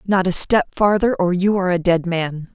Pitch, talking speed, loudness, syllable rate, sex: 185 Hz, 235 wpm, -18 LUFS, 4.9 syllables/s, female